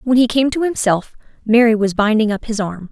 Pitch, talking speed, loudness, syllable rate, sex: 225 Hz, 225 wpm, -16 LUFS, 5.6 syllables/s, female